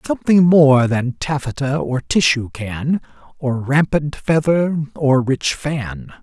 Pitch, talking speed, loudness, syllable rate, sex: 140 Hz, 125 wpm, -17 LUFS, 3.9 syllables/s, male